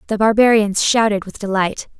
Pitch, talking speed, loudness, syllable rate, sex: 210 Hz, 150 wpm, -16 LUFS, 5.2 syllables/s, female